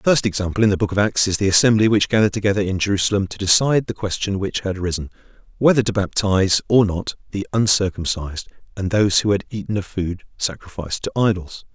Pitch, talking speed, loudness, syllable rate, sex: 100 Hz, 205 wpm, -19 LUFS, 6.6 syllables/s, male